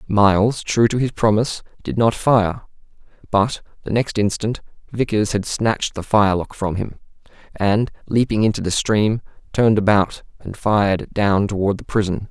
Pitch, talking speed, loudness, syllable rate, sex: 105 Hz, 155 wpm, -19 LUFS, 4.9 syllables/s, male